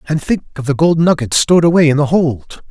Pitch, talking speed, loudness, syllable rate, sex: 155 Hz, 245 wpm, -13 LUFS, 5.8 syllables/s, male